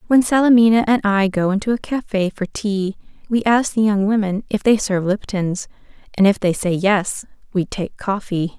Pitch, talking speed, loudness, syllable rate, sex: 205 Hz, 190 wpm, -18 LUFS, 5.0 syllables/s, female